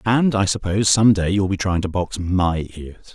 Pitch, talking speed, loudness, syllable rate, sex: 95 Hz, 230 wpm, -19 LUFS, 4.8 syllables/s, male